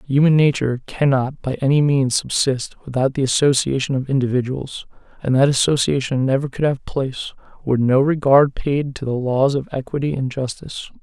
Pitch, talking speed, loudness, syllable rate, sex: 135 Hz, 165 wpm, -19 LUFS, 5.3 syllables/s, male